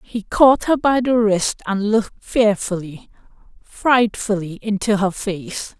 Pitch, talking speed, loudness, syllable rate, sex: 210 Hz, 135 wpm, -18 LUFS, 3.7 syllables/s, female